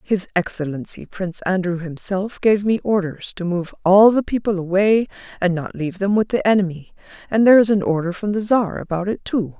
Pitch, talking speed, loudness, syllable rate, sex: 195 Hz, 200 wpm, -19 LUFS, 5.4 syllables/s, female